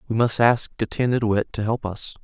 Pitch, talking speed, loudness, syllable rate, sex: 115 Hz, 190 wpm, -22 LUFS, 5.8 syllables/s, male